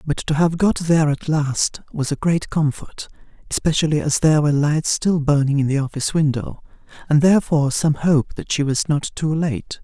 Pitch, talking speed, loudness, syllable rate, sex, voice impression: 150 Hz, 195 wpm, -19 LUFS, 5.3 syllables/s, male, slightly masculine, adult-like, slightly soft, slightly unique, kind